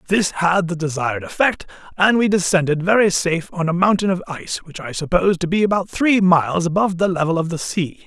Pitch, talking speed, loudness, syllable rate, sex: 180 Hz, 215 wpm, -18 LUFS, 6.1 syllables/s, male